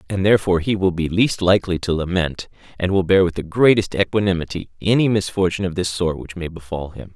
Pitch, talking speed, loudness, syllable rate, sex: 90 Hz, 210 wpm, -19 LUFS, 6.2 syllables/s, male